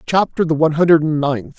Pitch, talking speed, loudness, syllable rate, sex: 160 Hz, 225 wpm, -16 LUFS, 6.1 syllables/s, male